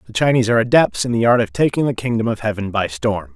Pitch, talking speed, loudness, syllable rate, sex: 110 Hz, 270 wpm, -17 LUFS, 6.9 syllables/s, male